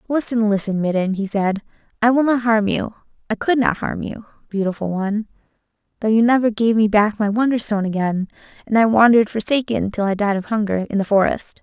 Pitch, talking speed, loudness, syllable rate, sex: 215 Hz, 190 wpm, -19 LUFS, 5.9 syllables/s, female